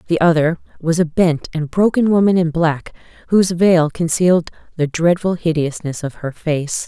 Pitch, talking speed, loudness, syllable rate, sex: 165 Hz, 165 wpm, -17 LUFS, 4.8 syllables/s, female